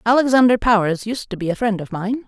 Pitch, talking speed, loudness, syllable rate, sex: 215 Hz, 235 wpm, -18 LUFS, 6.0 syllables/s, female